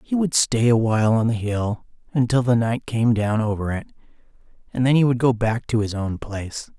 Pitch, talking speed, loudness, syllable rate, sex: 115 Hz, 210 wpm, -21 LUFS, 5.3 syllables/s, male